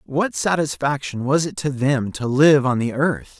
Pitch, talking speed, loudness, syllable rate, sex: 140 Hz, 195 wpm, -20 LUFS, 4.3 syllables/s, male